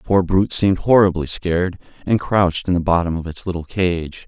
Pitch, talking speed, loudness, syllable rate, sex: 90 Hz, 210 wpm, -18 LUFS, 5.8 syllables/s, male